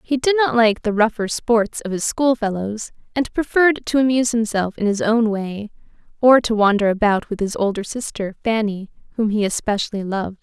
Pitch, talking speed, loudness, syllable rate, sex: 220 Hz, 190 wpm, -19 LUFS, 5.3 syllables/s, female